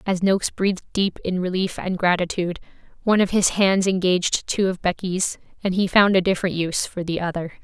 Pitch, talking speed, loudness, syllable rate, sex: 185 Hz, 195 wpm, -21 LUFS, 6.0 syllables/s, female